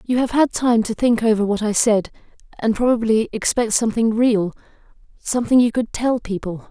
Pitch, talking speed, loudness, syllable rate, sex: 225 Hz, 170 wpm, -19 LUFS, 5.4 syllables/s, female